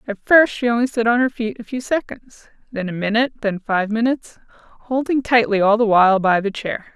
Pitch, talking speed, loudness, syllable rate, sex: 225 Hz, 215 wpm, -18 LUFS, 5.6 syllables/s, female